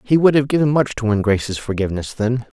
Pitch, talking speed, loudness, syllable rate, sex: 120 Hz, 230 wpm, -18 LUFS, 6.2 syllables/s, male